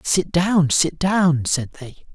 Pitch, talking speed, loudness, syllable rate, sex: 165 Hz, 170 wpm, -19 LUFS, 3.4 syllables/s, male